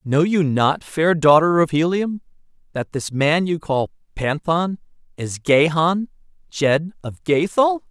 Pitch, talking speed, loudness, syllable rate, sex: 165 Hz, 135 wpm, -19 LUFS, 3.8 syllables/s, male